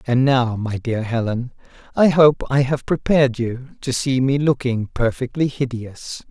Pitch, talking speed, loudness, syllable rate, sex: 130 Hz, 160 wpm, -19 LUFS, 4.4 syllables/s, male